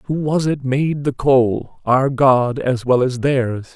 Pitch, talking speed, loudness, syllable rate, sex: 130 Hz, 190 wpm, -17 LUFS, 3.3 syllables/s, male